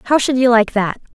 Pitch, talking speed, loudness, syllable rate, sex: 240 Hz, 260 wpm, -15 LUFS, 6.0 syllables/s, female